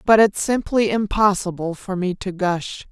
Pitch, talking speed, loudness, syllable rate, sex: 195 Hz, 165 wpm, -20 LUFS, 4.3 syllables/s, female